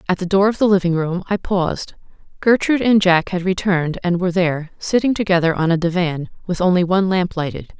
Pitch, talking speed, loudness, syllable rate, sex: 185 Hz, 210 wpm, -18 LUFS, 6.2 syllables/s, female